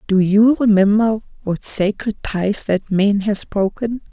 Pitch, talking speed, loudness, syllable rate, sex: 205 Hz, 145 wpm, -17 LUFS, 4.0 syllables/s, female